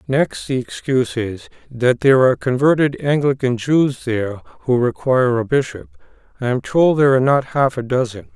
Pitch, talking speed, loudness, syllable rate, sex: 130 Hz, 170 wpm, -17 LUFS, 5.2 syllables/s, male